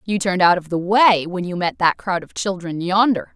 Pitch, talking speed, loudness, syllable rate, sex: 185 Hz, 250 wpm, -18 LUFS, 5.3 syllables/s, female